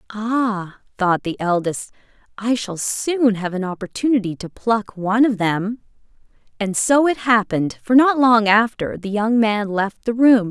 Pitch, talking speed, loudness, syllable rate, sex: 215 Hz, 165 wpm, -19 LUFS, 4.3 syllables/s, female